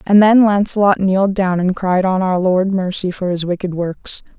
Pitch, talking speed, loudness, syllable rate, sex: 190 Hz, 205 wpm, -15 LUFS, 4.8 syllables/s, female